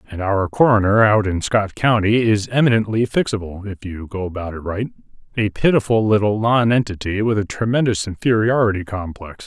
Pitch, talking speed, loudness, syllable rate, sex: 105 Hz, 160 wpm, -18 LUFS, 5.4 syllables/s, male